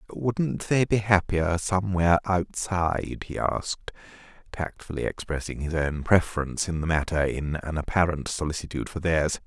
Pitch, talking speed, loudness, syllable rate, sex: 85 Hz, 140 wpm, -26 LUFS, 5.1 syllables/s, male